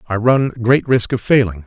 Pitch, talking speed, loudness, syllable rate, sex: 120 Hz, 215 wpm, -15 LUFS, 4.6 syllables/s, male